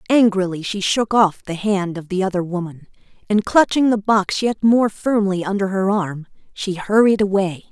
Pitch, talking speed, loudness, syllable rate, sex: 195 Hz, 180 wpm, -18 LUFS, 4.8 syllables/s, female